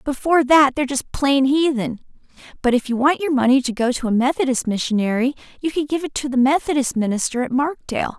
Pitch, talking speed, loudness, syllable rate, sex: 265 Hz, 205 wpm, -19 LUFS, 6.1 syllables/s, female